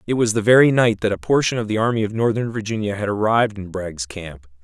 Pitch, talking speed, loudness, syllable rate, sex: 105 Hz, 245 wpm, -19 LUFS, 6.2 syllables/s, male